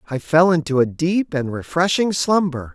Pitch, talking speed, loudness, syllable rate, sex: 155 Hz, 175 wpm, -19 LUFS, 4.7 syllables/s, male